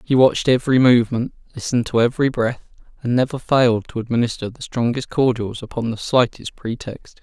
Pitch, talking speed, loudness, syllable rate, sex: 120 Hz, 165 wpm, -19 LUFS, 6.0 syllables/s, male